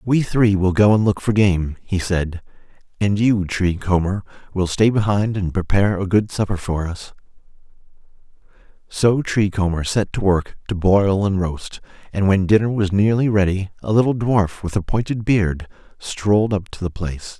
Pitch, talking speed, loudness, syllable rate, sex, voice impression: 100 Hz, 180 wpm, -19 LUFS, 4.7 syllables/s, male, very masculine, very adult-like, very middle-aged, very thick, tensed, very powerful, bright, soft, slightly muffled, fluent, very cool, very intellectual, slightly refreshing, very sincere, very calm, very mature, very friendly, very reassuring, very unique, elegant, very wild, very sweet, lively, very kind, slightly modest